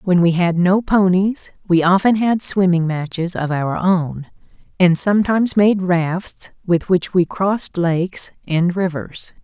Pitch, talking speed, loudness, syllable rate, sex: 180 Hz, 155 wpm, -17 LUFS, 4.0 syllables/s, female